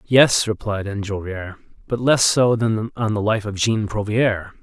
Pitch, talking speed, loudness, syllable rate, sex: 110 Hz, 170 wpm, -20 LUFS, 4.4 syllables/s, male